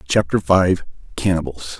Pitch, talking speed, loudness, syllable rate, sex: 90 Hz, 100 wpm, -19 LUFS, 4.6 syllables/s, male